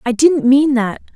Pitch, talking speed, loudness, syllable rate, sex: 265 Hz, 205 wpm, -14 LUFS, 4.3 syllables/s, female